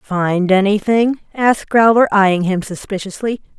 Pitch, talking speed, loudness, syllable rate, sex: 205 Hz, 115 wpm, -15 LUFS, 4.7 syllables/s, female